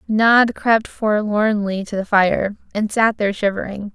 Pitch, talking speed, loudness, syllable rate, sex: 210 Hz, 150 wpm, -18 LUFS, 4.2 syllables/s, female